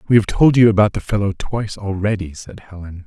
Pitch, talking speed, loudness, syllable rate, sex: 100 Hz, 215 wpm, -17 LUFS, 5.9 syllables/s, male